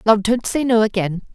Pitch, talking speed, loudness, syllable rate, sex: 220 Hz, 225 wpm, -18 LUFS, 5.3 syllables/s, female